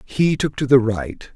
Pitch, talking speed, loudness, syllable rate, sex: 135 Hz, 220 wpm, -18 LUFS, 4.3 syllables/s, male